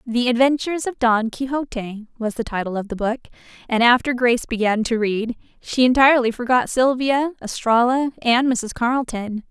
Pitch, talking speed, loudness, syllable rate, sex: 240 Hz, 160 wpm, -19 LUFS, 5.3 syllables/s, female